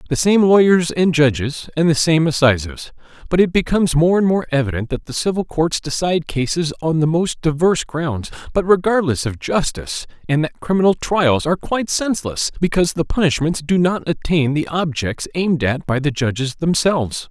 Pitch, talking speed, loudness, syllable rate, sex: 160 Hz, 180 wpm, -18 LUFS, 5.4 syllables/s, male